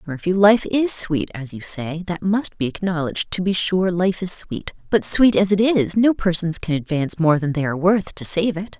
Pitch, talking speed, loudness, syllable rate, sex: 180 Hz, 230 wpm, -19 LUFS, 5.0 syllables/s, female